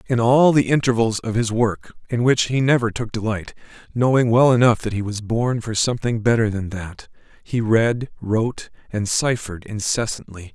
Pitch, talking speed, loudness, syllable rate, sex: 115 Hz, 165 wpm, -20 LUFS, 5.0 syllables/s, male